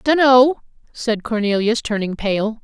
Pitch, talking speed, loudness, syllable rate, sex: 230 Hz, 115 wpm, -17 LUFS, 4.2 syllables/s, female